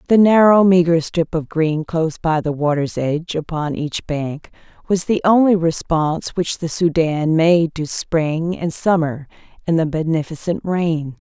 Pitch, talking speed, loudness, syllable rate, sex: 165 Hz, 160 wpm, -18 LUFS, 4.3 syllables/s, female